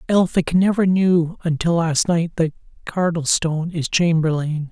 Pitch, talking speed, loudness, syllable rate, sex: 170 Hz, 125 wpm, -19 LUFS, 4.6 syllables/s, male